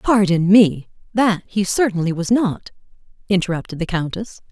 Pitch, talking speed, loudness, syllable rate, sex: 195 Hz, 135 wpm, -18 LUFS, 4.8 syllables/s, female